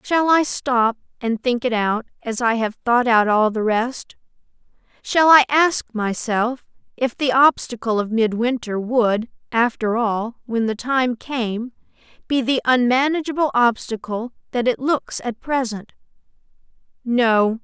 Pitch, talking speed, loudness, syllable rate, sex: 240 Hz, 140 wpm, -19 LUFS, 3.9 syllables/s, female